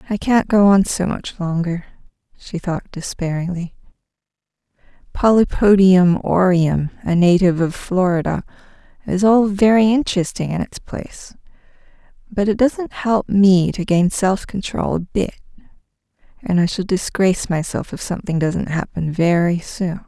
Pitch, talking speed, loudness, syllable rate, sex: 185 Hz, 135 wpm, -17 LUFS, 4.6 syllables/s, female